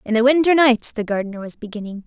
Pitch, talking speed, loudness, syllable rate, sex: 235 Hz, 235 wpm, -17 LUFS, 6.6 syllables/s, female